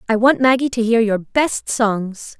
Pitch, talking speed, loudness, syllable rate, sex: 230 Hz, 200 wpm, -17 LUFS, 4.1 syllables/s, female